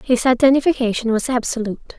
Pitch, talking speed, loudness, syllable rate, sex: 245 Hz, 120 wpm, -18 LUFS, 6.7 syllables/s, female